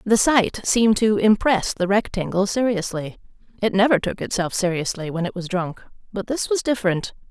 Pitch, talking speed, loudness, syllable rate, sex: 205 Hz, 170 wpm, -21 LUFS, 5.3 syllables/s, female